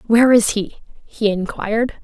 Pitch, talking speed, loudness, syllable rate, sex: 220 Hz, 145 wpm, -17 LUFS, 5.1 syllables/s, female